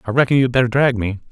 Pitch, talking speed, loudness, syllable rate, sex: 120 Hz, 275 wpm, -16 LUFS, 7.4 syllables/s, male